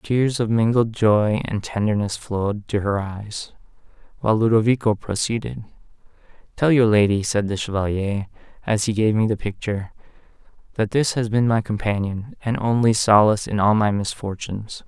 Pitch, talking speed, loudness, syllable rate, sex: 110 Hz, 150 wpm, -21 LUFS, 4.7 syllables/s, male